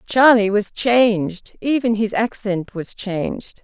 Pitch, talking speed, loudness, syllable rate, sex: 215 Hz, 130 wpm, -18 LUFS, 3.7 syllables/s, female